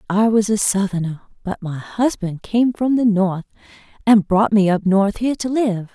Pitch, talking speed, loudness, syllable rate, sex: 205 Hz, 190 wpm, -18 LUFS, 4.7 syllables/s, female